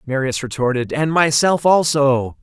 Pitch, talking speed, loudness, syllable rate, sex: 140 Hz, 125 wpm, -17 LUFS, 4.4 syllables/s, male